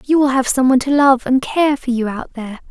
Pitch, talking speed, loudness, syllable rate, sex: 260 Hz, 290 wpm, -15 LUFS, 6.0 syllables/s, female